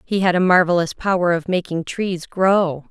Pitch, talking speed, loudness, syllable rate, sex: 180 Hz, 185 wpm, -18 LUFS, 4.7 syllables/s, female